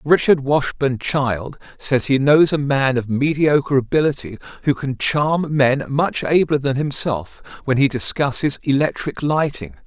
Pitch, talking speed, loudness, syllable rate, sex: 135 Hz, 145 wpm, -18 LUFS, 4.3 syllables/s, male